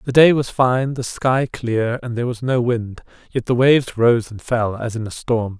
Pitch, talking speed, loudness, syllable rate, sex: 120 Hz, 235 wpm, -19 LUFS, 4.7 syllables/s, male